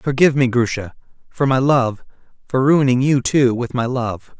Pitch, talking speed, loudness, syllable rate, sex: 125 Hz, 180 wpm, -17 LUFS, 4.7 syllables/s, male